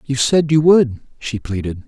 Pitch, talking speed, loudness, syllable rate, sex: 135 Hz, 195 wpm, -16 LUFS, 4.4 syllables/s, male